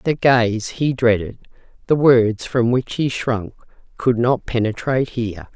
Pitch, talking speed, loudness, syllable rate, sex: 120 Hz, 150 wpm, -19 LUFS, 4.2 syllables/s, female